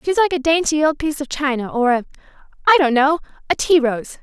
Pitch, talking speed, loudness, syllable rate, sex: 295 Hz, 215 wpm, -17 LUFS, 6.2 syllables/s, female